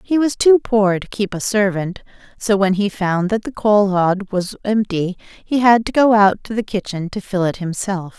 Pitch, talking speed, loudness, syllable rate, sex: 200 Hz, 220 wpm, -17 LUFS, 4.6 syllables/s, female